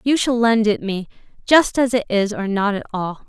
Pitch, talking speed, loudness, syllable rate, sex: 220 Hz, 240 wpm, -18 LUFS, 5.0 syllables/s, female